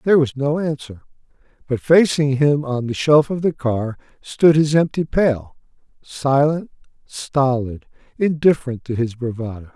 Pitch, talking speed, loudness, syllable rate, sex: 140 Hz, 140 wpm, -18 LUFS, 4.4 syllables/s, male